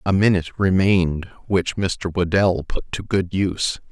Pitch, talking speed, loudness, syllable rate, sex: 90 Hz, 155 wpm, -21 LUFS, 4.5 syllables/s, male